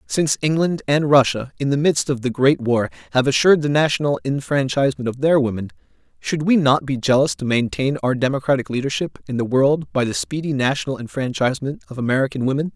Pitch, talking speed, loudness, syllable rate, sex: 135 Hz, 190 wpm, -19 LUFS, 6.1 syllables/s, male